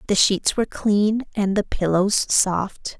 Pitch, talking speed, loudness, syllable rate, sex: 200 Hz, 160 wpm, -20 LUFS, 3.7 syllables/s, female